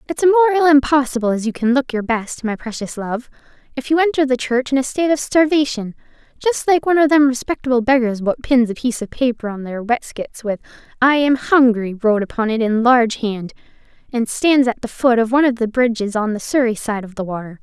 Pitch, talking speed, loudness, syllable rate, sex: 250 Hz, 230 wpm, -17 LUFS, 6.1 syllables/s, female